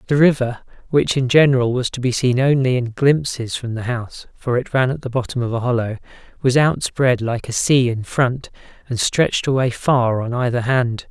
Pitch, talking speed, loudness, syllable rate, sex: 125 Hz, 195 wpm, -18 LUFS, 5.1 syllables/s, male